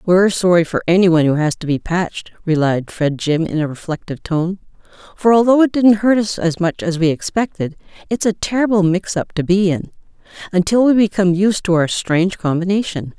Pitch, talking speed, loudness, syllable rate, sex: 180 Hz, 185 wpm, -16 LUFS, 5.6 syllables/s, female